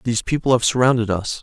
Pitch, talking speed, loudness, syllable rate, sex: 120 Hz, 210 wpm, -18 LUFS, 6.9 syllables/s, male